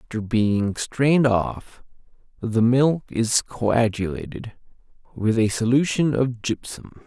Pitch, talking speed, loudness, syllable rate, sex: 120 Hz, 110 wpm, -22 LUFS, 3.8 syllables/s, male